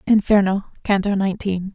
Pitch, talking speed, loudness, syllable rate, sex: 195 Hz, 105 wpm, -19 LUFS, 5.6 syllables/s, female